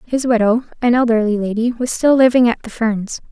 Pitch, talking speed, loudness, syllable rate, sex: 235 Hz, 200 wpm, -16 LUFS, 5.4 syllables/s, female